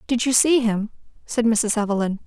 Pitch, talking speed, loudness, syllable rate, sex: 225 Hz, 185 wpm, -20 LUFS, 5.1 syllables/s, female